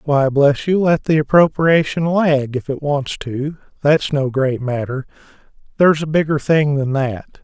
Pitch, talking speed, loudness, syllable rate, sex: 145 Hz, 155 wpm, -17 LUFS, 4.4 syllables/s, male